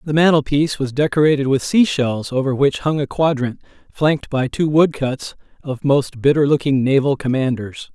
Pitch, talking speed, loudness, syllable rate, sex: 140 Hz, 175 wpm, -17 LUFS, 5.1 syllables/s, male